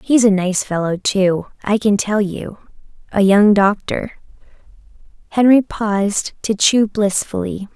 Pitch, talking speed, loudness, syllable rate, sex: 205 Hz, 125 wpm, -16 LUFS, 3.9 syllables/s, female